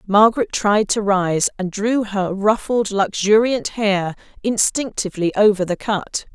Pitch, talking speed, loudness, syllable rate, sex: 205 Hz, 130 wpm, -18 LUFS, 3.9 syllables/s, female